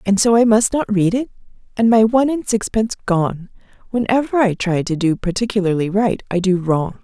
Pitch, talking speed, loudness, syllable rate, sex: 205 Hz, 195 wpm, -17 LUFS, 5.4 syllables/s, female